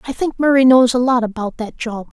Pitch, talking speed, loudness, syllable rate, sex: 245 Hz, 245 wpm, -16 LUFS, 5.6 syllables/s, male